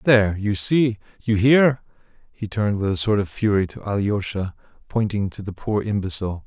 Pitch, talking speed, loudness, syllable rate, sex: 105 Hz, 175 wpm, -22 LUFS, 5.3 syllables/s, male